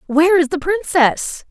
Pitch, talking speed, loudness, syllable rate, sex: 320 Hz, 160 wpm, -16 LUFS, 4.5 syllables/s, female